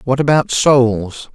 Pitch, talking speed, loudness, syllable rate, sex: 125 Hz, 135 wpm, -14 LUFS, 3.3 syllables/s, male